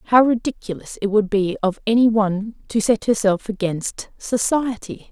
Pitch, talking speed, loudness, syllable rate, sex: 215 Hz, 155 wpm, -20 LUFS, 4.8 syllables/s, female